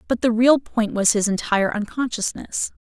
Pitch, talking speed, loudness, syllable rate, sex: 225 Hz, 170 wpm, -20 LUFS, 5.0 syllables/s, female